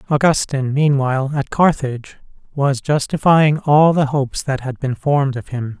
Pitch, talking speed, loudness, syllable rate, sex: 140 Hz, 155 wpm, -17 LUFS, 5.0 syllables/s, male